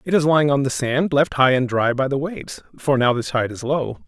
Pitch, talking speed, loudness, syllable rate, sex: 135 Hz, 280 wpm, -19 LUFS, 5.6 syllables/s, male